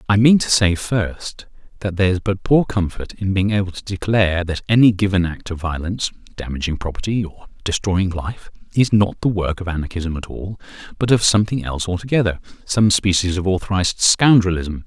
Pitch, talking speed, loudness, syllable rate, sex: 95 Hz, 165 wpm, -19 LUFS, 5.5 syllables/s, male